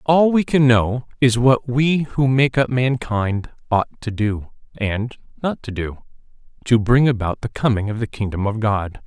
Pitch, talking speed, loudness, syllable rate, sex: 120 Hz, 185 wpm, -19 LUFS, 4.3 syllables/s, male